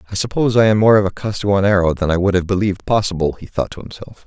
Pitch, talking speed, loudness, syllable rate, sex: 100 Hz, 255 wpm, -16 LUFS, 7.2 syllables/s, male